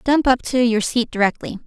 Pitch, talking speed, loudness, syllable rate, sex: 240 Hz, 215 wpm, -18 LUFS, 5.4 syllables/s, female